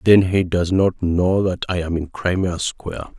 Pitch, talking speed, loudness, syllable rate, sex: 90 Hz, 205 wpm, -20 LUFS, 4.5 syllables/s, male